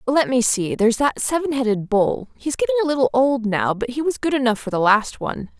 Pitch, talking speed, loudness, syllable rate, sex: 250 Hz, 245 wpm, -20 LUFS, 5.9 syllables/s, female